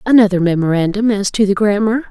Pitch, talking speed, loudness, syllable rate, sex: 205 Hz, 170 wpm, -14 LUFS, 6.3 syllables/s, female